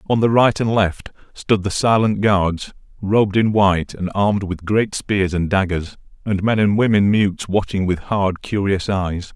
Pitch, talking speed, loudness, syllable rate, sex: 100 Hz, 185 wpm, -18 LUFS, 4.5 syllables/s, male